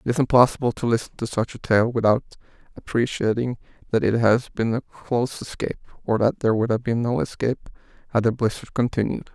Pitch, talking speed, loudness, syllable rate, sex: 115 Hz, 195 wpm, -23 LUFS, 6.2 syllables/s, male